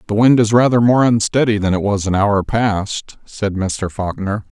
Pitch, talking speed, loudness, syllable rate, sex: 105 Hz, 195 wpm, -16 LUFS, 4.5 syllables/s, male